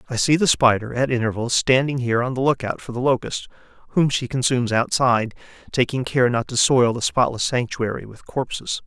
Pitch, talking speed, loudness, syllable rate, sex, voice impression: 125 Hz, 195 wpm, -20 LUFS, 5.6 syllables/s, male, adult-like, slightly cool, sincere, calm, kind